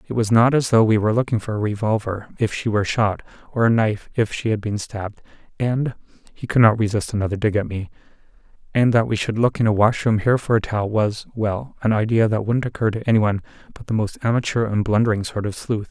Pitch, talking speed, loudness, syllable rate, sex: 110 Hz, 225 wpm, -20 LUFS, 6.3 syllables/s, male